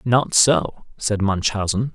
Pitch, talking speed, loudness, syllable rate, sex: 100 Hz, 125 wpm, -19 LUFS, 3.5 syllables/s, male